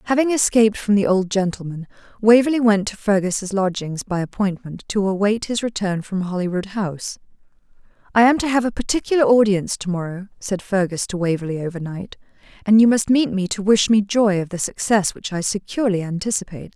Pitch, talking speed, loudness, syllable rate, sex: 200 Hz, 180 wpm, -19 LUFS, 5.8 syllables/s, female